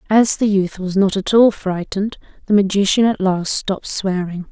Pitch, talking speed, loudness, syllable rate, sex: 195 Hz, 185 wpm, -17 LUFS, 5.0 syllables/s, female